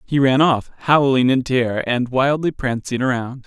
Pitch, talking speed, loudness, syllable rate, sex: 130 Hz, 175 wpm, -18 LUFS, 4.7 syllables/s, male